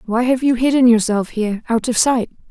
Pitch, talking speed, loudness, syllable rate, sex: 235 Hz, 215 wpm, -16 LUFS, 5.6 syllables/s, female